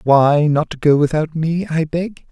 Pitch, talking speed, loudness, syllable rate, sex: 155 Hz, 180 wpm, -16 LUFS, 3.7 syllables/s, male